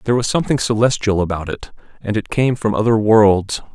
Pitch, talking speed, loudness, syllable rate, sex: 110 Hz, 190 wpm, -16 LUFS, 5.9 syllables/s, male